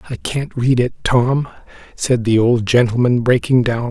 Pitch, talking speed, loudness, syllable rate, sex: 120 Hz, 170 wpm, -16 LUFS, 4.4 syllables/s, male